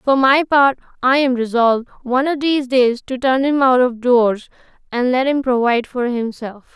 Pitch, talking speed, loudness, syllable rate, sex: 255 Hz, 195 wpm, -16 LUFS, 5.0 syllables/s, female